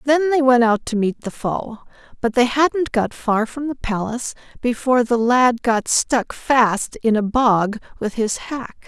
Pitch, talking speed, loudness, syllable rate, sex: 240 Hz, 190 wpm, -19 LUFS, 4.1 syllables/s, female